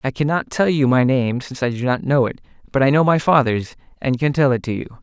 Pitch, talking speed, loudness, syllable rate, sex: 135 Hz, 275 wpm, -18 LUFS, 6.0 syllables/s, male